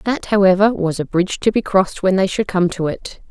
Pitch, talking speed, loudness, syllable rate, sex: 190 Hz, 255 wpm, -17 LUFS, 5.6 syllables/s, female